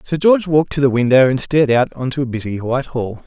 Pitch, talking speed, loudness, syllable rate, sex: 135 Hz, 240 wpm, -16 LUFS, 6.3 syllables/s, male